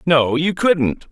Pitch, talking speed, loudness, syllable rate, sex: 150 Hz, 160 wpm, -17 LUFS, 3.0 syllables/s, male